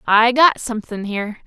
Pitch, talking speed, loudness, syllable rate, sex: 225 Hz, 165 wpm, -17 LUFS, 5.6 syllables/s, female